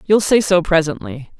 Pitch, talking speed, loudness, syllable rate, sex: 165 Hz, 170 wpm, -15 LUFS, 5.0 syllables/s, female